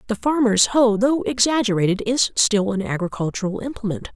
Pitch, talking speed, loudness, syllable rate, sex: 220 Hz, 145 wpm, -20 LUFS, 5.4 syllables/s, female